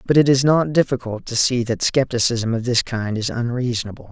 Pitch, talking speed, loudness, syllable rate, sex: 125 Hz, 205 wpm, -19 LUFS, 5.5 syllables/s, male